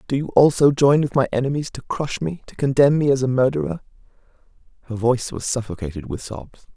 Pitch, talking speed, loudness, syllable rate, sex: 125 Hz, 195 wpm, -20 LUFS, 6.0 syllables/s, male